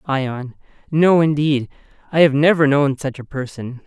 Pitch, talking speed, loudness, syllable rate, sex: 140 Hz, 155 wpm, -17 LUFS, 4.3 syllables/s, male